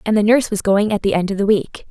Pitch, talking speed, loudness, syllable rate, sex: 205 Hz, 345 wpm, -17 LUFS, 6.7 syllables/s, female